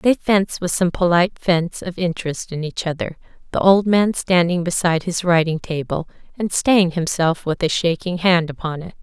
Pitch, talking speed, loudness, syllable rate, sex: 175 Hz, 185 wpm, -19 LUFS, 5.1 syllables/s, female